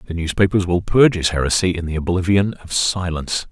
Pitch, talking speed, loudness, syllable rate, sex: 90 Hz, 190 wpm, -18 LUFS, 6.0 syllables/s, male